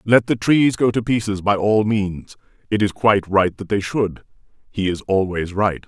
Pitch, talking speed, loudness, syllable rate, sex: 105 Hz, 195 wpm, -19 LUFS, 4.4 syllables/s, male